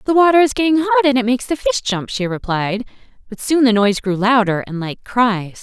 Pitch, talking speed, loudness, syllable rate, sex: 230 Hz, 235 wpm, -16 LUFS, 6.0 syllables/s, female